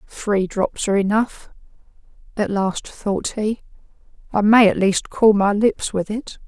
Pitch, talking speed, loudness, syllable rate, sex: 210 Hz, 155 wpm, -19 LUFS, 4.0 syllables/s, female